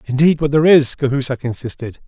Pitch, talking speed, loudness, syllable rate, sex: 140 Hz, 175 wpm, -15 LUFS, 6.4 syllables/s, male